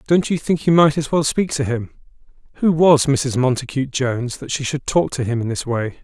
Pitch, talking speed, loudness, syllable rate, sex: 140 Hz, 240 wpm, -18 LUFS, 5.4 syllables/s, male